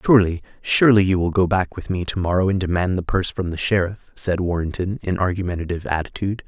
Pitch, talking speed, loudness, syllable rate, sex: 90 Hz, 205 wpm, -21 LUFS, 6.5 syllables/s, male